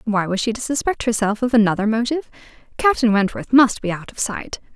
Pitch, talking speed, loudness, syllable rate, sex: 230 Hz, 200 wpm, -19 LUFS, 5.9 syllables/s, female